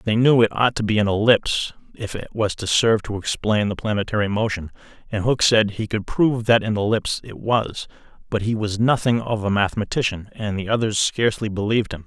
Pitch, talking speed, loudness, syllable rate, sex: 110 Hz, 210 wpm, -21 LUFS, 5.9 syllables/s, male